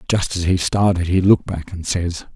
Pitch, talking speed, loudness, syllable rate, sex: 90 Hz, 230 wpm, -19 LUFS, 5.3 syllables/s, male